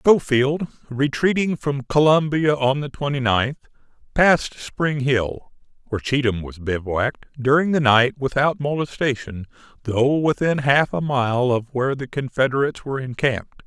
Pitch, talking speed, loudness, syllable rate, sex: 135 Hz, 135 wpm, -20 LUFS, 4.7 syllables/s, male